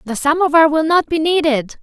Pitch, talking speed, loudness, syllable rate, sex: 305 Hz, 195 wpm, -14 LUFS, 5.3 syllables/s, female